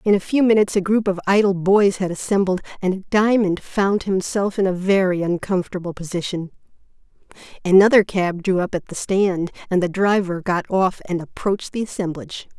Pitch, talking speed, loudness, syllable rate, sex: 190 Hz, 170 wpm, -20 LUFS, 5.4 syllables/s, female